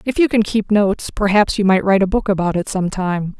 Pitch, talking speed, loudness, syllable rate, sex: 200 Hz, 265 wpm, -17 LUFS, 5.8 syllables/s, female